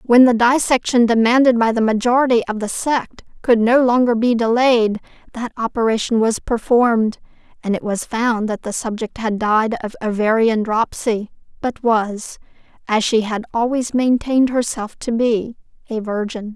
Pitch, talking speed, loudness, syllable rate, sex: 230 Hz, 150 wpm, -17 LUFS, 4.6 syllables/s, female